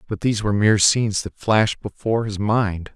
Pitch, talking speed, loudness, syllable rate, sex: 105 Hz, 205 wpm, -20 LUFS, 6.1 syllables/s, male